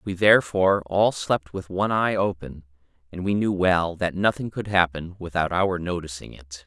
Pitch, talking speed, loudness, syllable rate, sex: 90 Hz, 180 wpm, -23 LUFS, 5.0 syllables/s, male